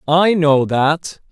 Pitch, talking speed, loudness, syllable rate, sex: 155 Hz, 135 wpm, -15 LUFS, 2.8 syllables/s, male